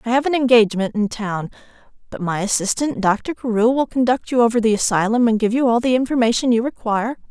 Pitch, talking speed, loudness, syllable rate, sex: 230 Hz, 205 wpm, -18 LUFS, 6.2 syllables/s, female